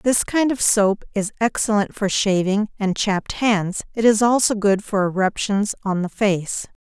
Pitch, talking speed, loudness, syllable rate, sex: 205 Hz, 165 wpm, -20 LUFS, 4.4 syllables/s, female